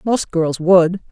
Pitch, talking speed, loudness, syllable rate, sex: 180 Hz, 160 wpm, -15 LUFS, 3.2 syllables/s, female